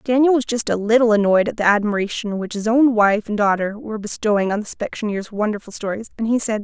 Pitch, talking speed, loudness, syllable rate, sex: 215 Hz, 225 wpm, -19 LUFS, 6.2 syllables/s, female